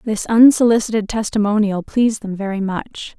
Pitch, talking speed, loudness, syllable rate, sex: 210 Hz, 130 wpm, -17 LUFS, 5.3 syllables/s, female